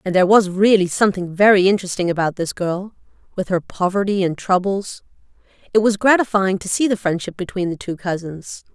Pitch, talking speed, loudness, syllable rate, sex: 190 Hz, 180 wpm, -18 LUFS, 5.8 syllables/s, female